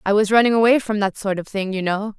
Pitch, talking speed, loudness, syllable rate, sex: 210 Hz, 300 wpm, -19 LUFS, 6.3 syllables/s, female